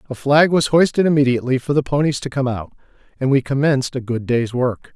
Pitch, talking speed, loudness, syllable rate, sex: 135 Hz, 220 wpm, -18 LUFS, 6.1 syllables/s, male